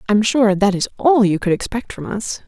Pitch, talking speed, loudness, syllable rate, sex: 210 Hz, 240 wpm, -17 LUFS, 5.1 syllables/s, female